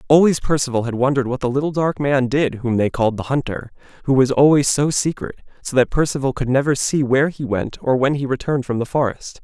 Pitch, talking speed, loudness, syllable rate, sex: 135 Hz, 230 wpm, -18 LUFS, 6.2 syllables/s, male